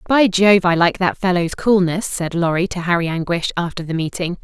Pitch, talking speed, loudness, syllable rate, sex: 180 Hz, 205 wpm, -17 LUFS, 5.3 syllables/s, female